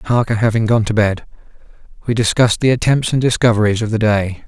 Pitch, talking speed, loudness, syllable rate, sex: 110 Hz, 175 wpm, -15 LUFS, 6.1 syllables/s, male